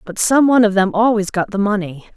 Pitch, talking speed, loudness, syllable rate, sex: 205 Hz, 250 wpm, -15 LUFS, 5.9 syllables/s, female